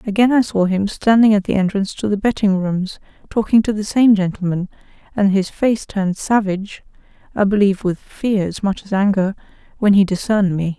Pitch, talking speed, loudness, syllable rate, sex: 200 Hz, 180 wpm, -17 LUFS, 5.6 syllables/s, female